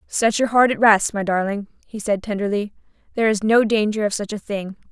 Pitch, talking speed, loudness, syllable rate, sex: 210 Hz, 220 wpm, -20 LUFS, 5.7 syllables/s, female